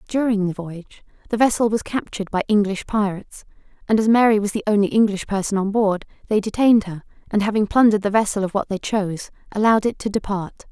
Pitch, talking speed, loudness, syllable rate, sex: 205 Hz, 200 wpm, -20 LUFS, 6.7 syllables/s, female